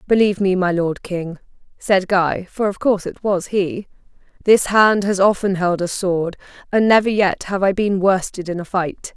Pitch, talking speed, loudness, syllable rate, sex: 190 Hz, 190 wpm, -18 LUFS, 4.6 syllables/s, female